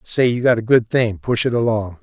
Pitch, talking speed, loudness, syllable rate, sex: 115 Hz, 265 wpm, -17 LUFS, 5.2 syllables/s, male